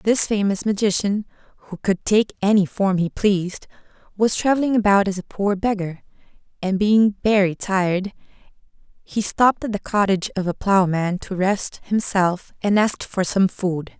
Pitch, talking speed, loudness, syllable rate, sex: 200 Hz, 160 wpm, -20 LUFS, 4.9 syllables/s, female